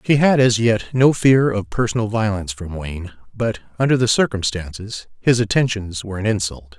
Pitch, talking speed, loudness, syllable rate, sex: 110 Hz, 175 wpm, -19 LUFS, 5.3 syllables/s, male